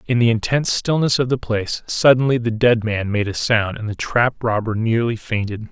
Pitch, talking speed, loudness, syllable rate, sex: 115 Hz, 210 wpm, -19 LUFS, 5.3 syllables/s, male